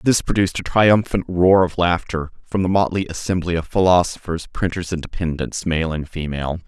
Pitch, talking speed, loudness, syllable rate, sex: 85 Hz, 170 wpm, -19 LUFS, 5.3 syllables/s, male